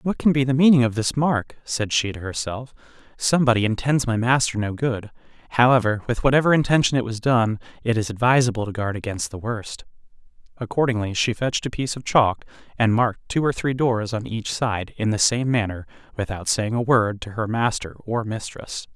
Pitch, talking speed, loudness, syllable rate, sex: 115 Hz, 195 wpm, -22 LUFS, 5.5 syllables/s, male